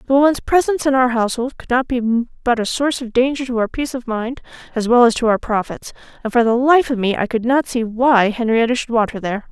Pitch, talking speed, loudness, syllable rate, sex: 240 Hz, 260 wpm, -17 LUFS, 6.1 syllables/s, female